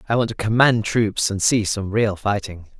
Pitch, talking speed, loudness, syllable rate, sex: 105 Hz, 215 wpm, -20 LUFS, 4.7 syllables/s, male